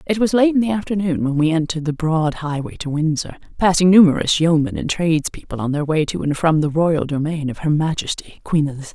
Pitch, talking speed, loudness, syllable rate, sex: 160 Hz, 220 wpm, -18 LUFS, 6.1 syllables/s, female